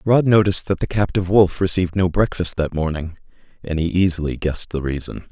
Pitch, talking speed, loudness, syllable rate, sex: 90 Hz, 190 wpm, -19 LUFS, 6.2 syllables/s, male